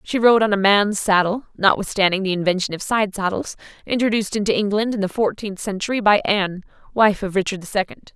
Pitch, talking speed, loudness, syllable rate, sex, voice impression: 200 Hz, 190 wpm, -19 LUFS, 6.0 syllables/s, female, very feminine, adult-like, slightly fluent, intellectual, slightly calm, slightly strict